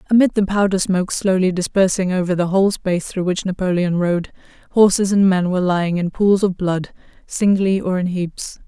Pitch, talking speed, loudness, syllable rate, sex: 185 Hz, 185 wpm, -18 LUFS, 5.5 syllables/s, female